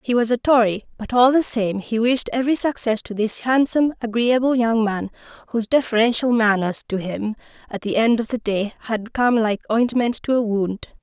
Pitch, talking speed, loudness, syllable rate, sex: 230 Hz, 195 wpm, -20 LUFS, 5.3 syllables/s, female